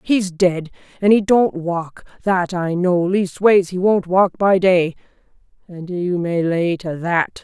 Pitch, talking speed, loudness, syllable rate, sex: 180 Hz, 170 wpm, -18 LUFS, 3.6 syllables/s, female